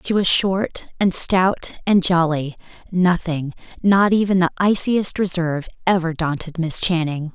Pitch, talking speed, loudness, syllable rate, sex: 175 Hz, 140 wpm, -19 LUFS, 4.3 syllables/s, female